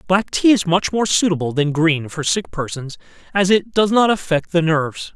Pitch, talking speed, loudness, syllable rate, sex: 175 Hz, 210 wpm, -17 LUFS, 5.0 syllables/s, male